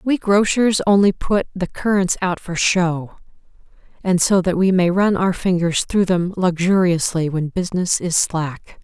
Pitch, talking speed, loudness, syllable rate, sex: 180 Hz, 165 wpm, -18 LUFS, 4.3 syllables/s, female